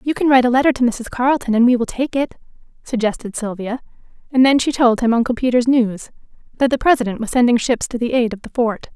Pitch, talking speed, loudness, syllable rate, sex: 245 Hz, 235 wpm, -17 LUFS, 6.3 syllables/s, female